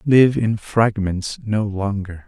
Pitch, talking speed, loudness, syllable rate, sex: 105 Hz, 130 wpm, -20 LUFS, 3.3 syllables/s, male